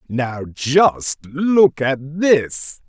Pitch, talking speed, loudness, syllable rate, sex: 145 Hz, 105 wpm, -17 LUFS, 2.1 syllables/s, male